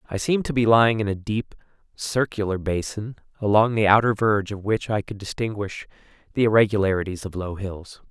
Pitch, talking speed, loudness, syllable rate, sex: 105 Hz, 180 wpm, -23 LUFS, 5.8 syllables/s, male